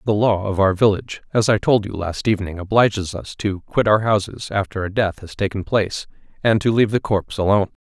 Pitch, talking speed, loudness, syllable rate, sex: 100 Hz, 230 wpm, -20 LUFS, 6.2 syllables/s, male